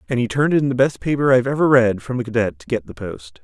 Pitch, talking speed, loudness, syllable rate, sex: 120 Hz, 295 wpm, -18 LUFS, 6.8 syllables/s, male